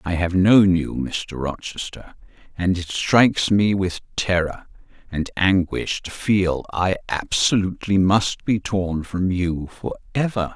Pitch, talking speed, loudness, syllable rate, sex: 95 Hz, 140 wpm, -21 LUFS, 3.9 syllables/s, male